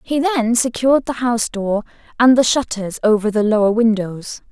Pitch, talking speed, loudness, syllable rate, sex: 230 Hz, 175 wpm, -17 LUFS, 5.1 syllables/s, female